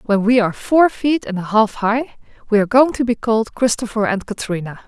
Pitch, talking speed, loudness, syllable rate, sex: 225 Hz, 220 wpm, -17 LUFS, 5.7 syllables/s, female